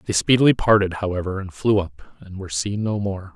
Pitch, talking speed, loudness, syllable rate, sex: 100 Hz, 215 wpm, -20 LUFS, 5.8 syllables/s, male